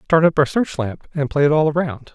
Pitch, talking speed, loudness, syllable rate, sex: 150 Hz, 280 wpm, -18 LUFS, 5.5 syllables/s, male